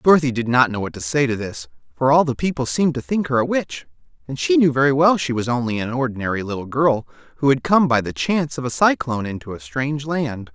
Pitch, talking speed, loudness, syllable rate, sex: 135 Hz, 250 wpm, -20 LUFS, 6.2 syllables/s, male